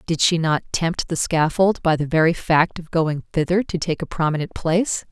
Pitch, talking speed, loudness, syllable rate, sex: 165 Hz, 210 wpm, -20 LUFS, 5.0 syllables/s, female